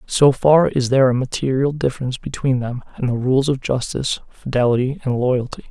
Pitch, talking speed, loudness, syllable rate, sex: 130 Hz, 180 wpm, -19 LUFS, 5.7 syllables/s, male